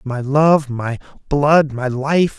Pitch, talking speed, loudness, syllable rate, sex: 140 Hz, 150 wpm, -17 LUFS, 3.0 syllables/s, male